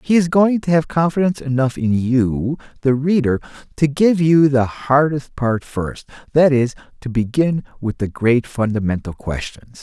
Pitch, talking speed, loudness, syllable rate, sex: 135 Hz, 165 wpm, -18 LUFS, 4.5 syllables/s, male